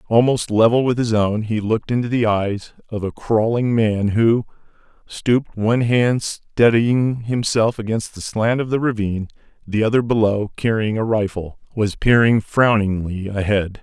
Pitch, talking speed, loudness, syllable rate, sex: 110 Hz, 150 wpm, -19 LUFS, 4.6 syllables/s, male